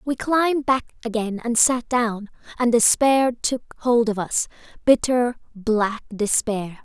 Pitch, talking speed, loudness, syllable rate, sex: 235 Hz, 140 wpm, -21 LUFS, 3.9 syllables/s, female